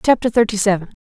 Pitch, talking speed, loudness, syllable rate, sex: 210 Hz, 175 wpm, -16 LUFS, 7.3 syllables/s, female